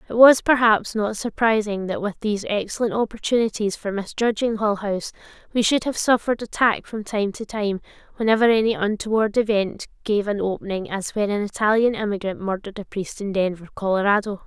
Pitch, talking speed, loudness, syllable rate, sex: 210 Hz, 170 wpm, -22 LUFS, 5.7 syllables/s, female